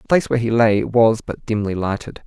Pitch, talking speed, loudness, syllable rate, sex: 110 Hz, 240 wpm, -18 LUFS, 5.8 syllables/s, male